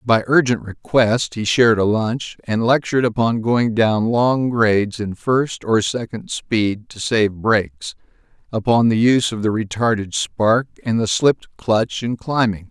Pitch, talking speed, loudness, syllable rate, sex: 115 Hz, 165 wpm, -18 LUFS, 4.3 syllables/s, male